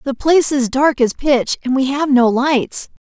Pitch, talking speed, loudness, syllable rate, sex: 265 Hz, 215 wpm, -15 LUFS, 4.4 syllables/s, female